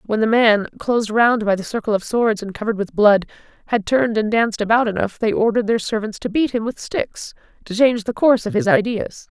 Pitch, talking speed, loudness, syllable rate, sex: 220 Hz, 230 wpm, -18 LUFS, 6.1 syllables/s, female